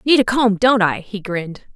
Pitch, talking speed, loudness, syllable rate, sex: 210 Hz, 240 wpm, -17 LUFS, 5.1 syllables/s, female